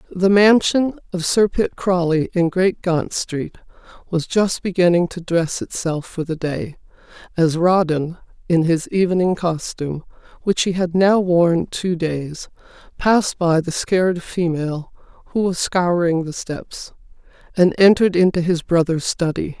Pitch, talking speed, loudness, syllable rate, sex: 175 Hz, 145 wpm, -19 LUFS, 4.3 syllables/s, female